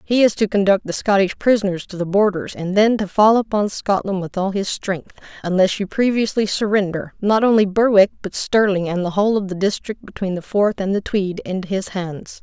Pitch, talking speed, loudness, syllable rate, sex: 200 Hz, 210 wpm, -19 LUFS, 5.3 syllables/s, female